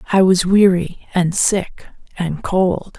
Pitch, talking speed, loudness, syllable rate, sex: 185 Hz, 140 wpm, -16 LUFS, 3.3 syllables/s, female